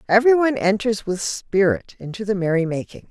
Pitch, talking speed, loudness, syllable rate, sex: 205 Hz, 175 wpm, -20 LUFS, 5.9 syllables/s, female